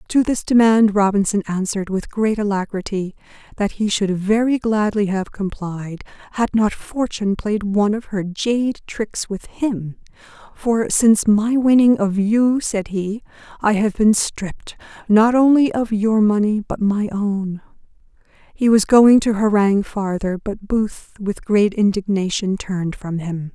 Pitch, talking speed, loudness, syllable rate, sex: 210 Hz, 155 wpm, -18 LUFS, 4.3 syllables/s, female